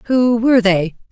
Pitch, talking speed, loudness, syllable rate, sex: 220 Hz, 160 wpm, -14 LUFS, 4.3 syllables/s, female